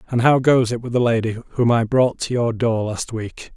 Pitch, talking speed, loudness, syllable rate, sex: 120 Hz, 255 wpm, -19 LUFS, 4.7 syllables/s, male